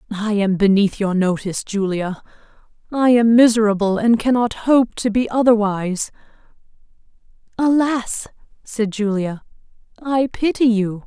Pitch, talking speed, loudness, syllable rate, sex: 220 Hz, 115 wpm, -18 LUFS, 4.6 syllables/s, female